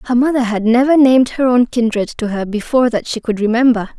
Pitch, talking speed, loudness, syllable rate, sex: 240 Hz, 225 wpm, -14 LUFS, 5.9 syllables/s, female